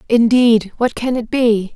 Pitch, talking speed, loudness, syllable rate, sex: 230 Hz, 170 wpm, -15 LUFS, 4.0 syllables/s, female